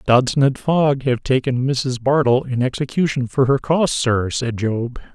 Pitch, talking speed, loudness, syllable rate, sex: 130 Hz, 175 wpm, -18 LUFS, 4.4 syllables/s, male